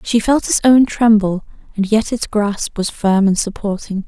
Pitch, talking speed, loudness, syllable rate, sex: 210 Hz, 190 wpm, -15 LUFS, 4.4 syllables/s, female